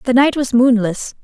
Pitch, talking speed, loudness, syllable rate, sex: 245 Hz, 195 wpm, -15 LUFS, 4.8 syllables/s, female